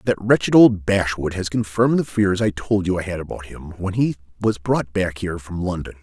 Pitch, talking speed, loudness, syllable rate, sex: 95 Hz, 230 wpm, -20 LUFS, 5.4 syllables/s, male